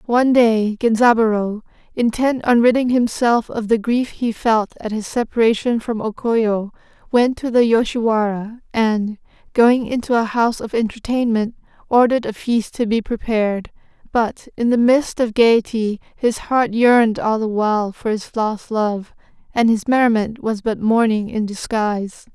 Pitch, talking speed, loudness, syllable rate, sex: 225 Hz, 160 wpm, -18 LUFS, 4.6 syllables/s, female